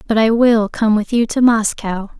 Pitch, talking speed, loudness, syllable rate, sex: 220 Hz, 220 wpm, -15 LUFS, 4.6 syllables/s, female